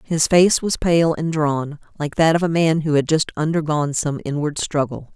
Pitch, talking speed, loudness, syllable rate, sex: 155 Hz, 210 wpm, -19 LUFS, 4.8 syllables/s, female